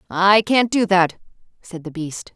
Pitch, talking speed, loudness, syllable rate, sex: 190 Hz, 180 wpm, -18 LUFS, 4.0 syllables/s, female